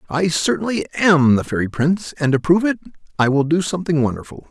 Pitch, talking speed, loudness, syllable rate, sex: 160 Hz, 200 wpm, -18 LUFS, 6.3 syllables/s, male